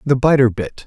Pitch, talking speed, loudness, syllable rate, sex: 125 Hz, 210 wpm, -15 LUFS, 5.2 syllables/s, male